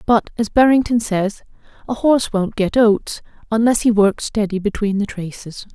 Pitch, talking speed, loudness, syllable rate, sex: 215 Hz, 165 wpm, -17 LUFS, 4.8 syllables/s, female